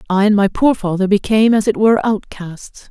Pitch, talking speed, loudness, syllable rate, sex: 205 Hz, 205 wpm, -14 LUFS, 5.6 syllables/s, female